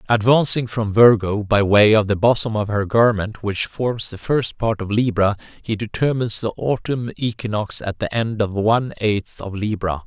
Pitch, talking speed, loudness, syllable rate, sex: 110 Hz, 185 wpm, -19 LUFS, 4.7 syllables/s, male